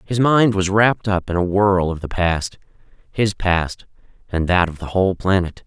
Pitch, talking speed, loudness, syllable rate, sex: 95 Hz, 190 wpm, -18 LUFS, 4.7 syllables/s, male